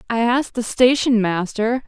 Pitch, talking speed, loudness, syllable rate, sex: 230 Hz, 160 wpm, -18 LUFS, 4.8 syllables/s, female